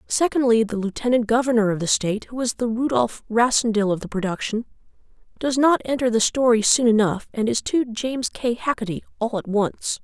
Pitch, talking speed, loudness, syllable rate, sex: 230 Hz, 185 wpm, -21 LUFS, 5.6 syllables/s, female